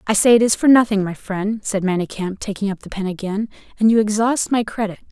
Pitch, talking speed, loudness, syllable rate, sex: 205 Hz, 235 wpm, -18 LUFS, 5.9 syllables/s, female